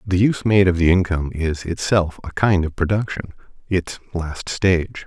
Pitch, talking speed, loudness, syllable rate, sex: 90 Hz, 165 wpm, -20 LUFS, 5.0 syllables/s, male